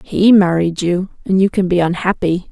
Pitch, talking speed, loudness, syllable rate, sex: 185 Hz, 165 wpm, -15 LUFS, 4.8 syllables/s, female